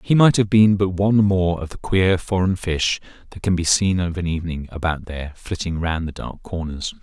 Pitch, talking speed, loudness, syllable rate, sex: 90 Hz, 220 wpm, -20 LUFS, 5.3 syllables/s, male